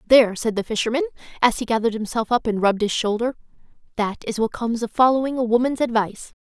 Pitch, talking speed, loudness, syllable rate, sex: 230 Hz, 205 wpm, -21 LUFS, 7.0 syllables/s, female